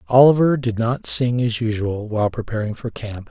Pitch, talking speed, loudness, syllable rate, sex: 115 Hz, 180 wpm, -19 LUFS, 5.1 syllables/s, male